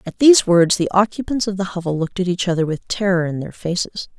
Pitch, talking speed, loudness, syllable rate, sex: 185 Hz, 245 wpm, -18 LUFS, 6.3 syllables/s, female